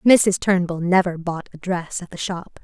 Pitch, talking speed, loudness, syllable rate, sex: 180 Hz, 205 wpm, -21 LUFS, 4.3 syllables/s, female